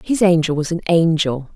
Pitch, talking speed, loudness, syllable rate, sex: 165 Hz, 190 wpm, -17 LUFS, 5.1 syllables/s, female